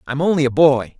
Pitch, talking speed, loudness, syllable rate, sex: 140 Hz, 240 wpm, -16 LUFS, 5.9 syllables/s, male